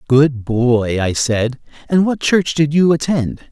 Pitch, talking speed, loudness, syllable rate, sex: 140 Hz, 170 wpm, -16 LUFS, 3.7 syllables/s, male